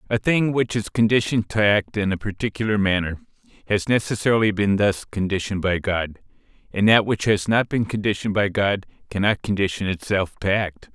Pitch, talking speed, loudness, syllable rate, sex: 105 Hz, 175 wpm, -21 LUFS, 5.7 syllables/s, male